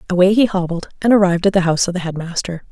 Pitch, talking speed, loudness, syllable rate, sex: 185 Hz, 265 wpm, -16 LUFS, 7.6 syllables/s, female